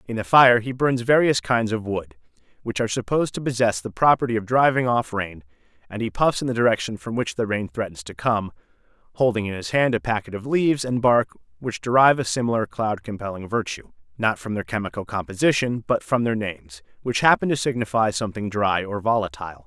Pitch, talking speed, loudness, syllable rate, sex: 110 Hz, 205 wpm, -22 LUFS, 5.9 syllables/s, male